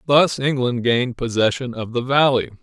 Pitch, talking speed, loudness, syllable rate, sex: 125 Hz, 160 wpm, -19 LUFS, 5.1 syllables/s, male